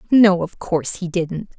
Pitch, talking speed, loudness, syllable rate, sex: 180 Hz, 190 wpm, -19 LUFS, 4.5 syllables/s, female